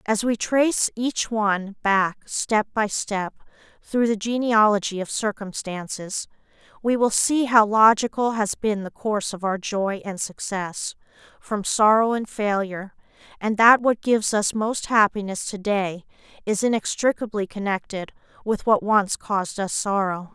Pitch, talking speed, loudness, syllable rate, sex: 210 Hz, 145 wpm, -22 LUFS, 4.4 syllables/s, female